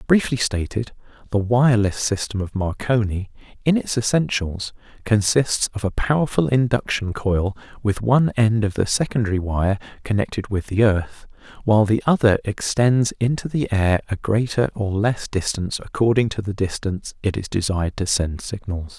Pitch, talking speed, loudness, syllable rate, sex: 110 Hz, 155 wpm, -21 LUFS, 5.0 syllables/s, male